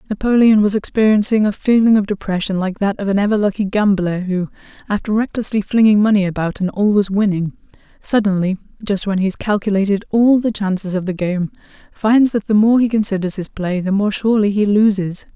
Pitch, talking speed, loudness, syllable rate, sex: 205 Hz, 190 wpm, -16 LUFS, 5.8 syllables/s, female